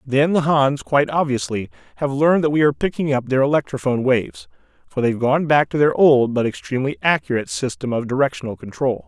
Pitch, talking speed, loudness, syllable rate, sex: 130 Hz, 190 wpm, -19 LUFS, 6.3 syllables/s, male